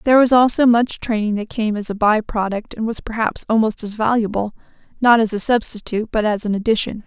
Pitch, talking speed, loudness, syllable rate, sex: 220 Hz, 195 wpm, -18 LUFS, 5.9 syllables/s, female